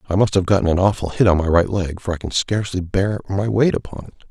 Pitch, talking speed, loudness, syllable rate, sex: 95 Hz, 280 wpm, -19 LUFS, 6.5 syllables/s, male